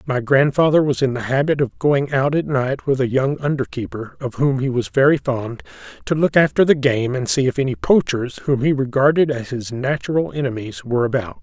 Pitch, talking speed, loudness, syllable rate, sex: 135 Hz, 215 wpm, -19 LUFS, 5.4 syllables/s, male